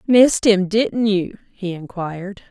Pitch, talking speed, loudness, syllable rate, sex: 200 Hz, 120 wpm, -18 LUFS, 4.2 syllables/s, female